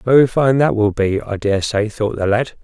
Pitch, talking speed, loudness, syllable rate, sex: 115 Hz, 250 wpm, -17 LUFS, 4.7 syllables/s, male